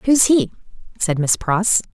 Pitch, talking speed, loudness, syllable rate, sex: 200 Hz, 155 wpm, -17 LUFS, 4.0 syllables/s, female